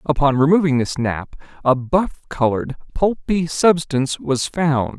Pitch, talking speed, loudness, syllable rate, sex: 145 Hz, 130 wpm, -19 LUFS, 4.3 syllables/s, male